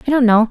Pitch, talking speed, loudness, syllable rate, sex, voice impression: 240 Hz, 355 wpm, -13 LUFS, 8.1 syllables/s, female, feminine, adult-like, soft, slightly sincere, calm, friendly, reassuring, kind